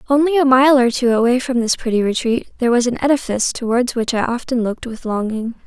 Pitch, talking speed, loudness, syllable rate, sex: 245 Hz, 220 wpm, -17 LUFS, 6.3 syllables/s, female